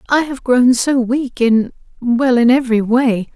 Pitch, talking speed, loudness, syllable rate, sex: 245 Hz, 160 wpm, -14 LUFS, 4.2 syllables/s, female